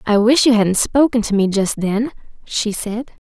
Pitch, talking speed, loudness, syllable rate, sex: 220 Hz, 200 wpm, -17 LUFS, 4.4 syllables/s, female